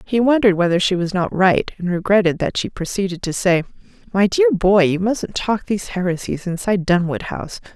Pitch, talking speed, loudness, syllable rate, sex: 185 Hz, 195 wpm, -18 LUFS, 5.6 syllables/s, female